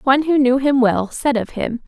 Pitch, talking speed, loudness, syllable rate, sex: 265 Hz, 255 wpm, -17 LUFS, 5.1 syllables/s, female